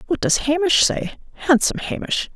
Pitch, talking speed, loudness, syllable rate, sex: 330 Hz, 125 wpm, -19 LUFS, 5.3 syllables/s, female